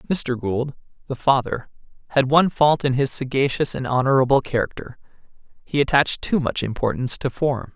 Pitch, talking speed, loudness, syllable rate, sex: 135 Hz, 155 wpm, -21 LUFS, 5.6 syllables/s, male